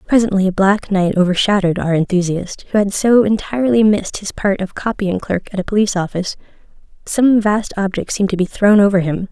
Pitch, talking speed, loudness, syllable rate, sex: 200 Hz, 185 wpm, -16 LUFS, 5.9 syllables/s, female